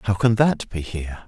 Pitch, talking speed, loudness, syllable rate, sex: 105 Hz, 235 wpm, -22 LUFS, 4.9 syllables/s, male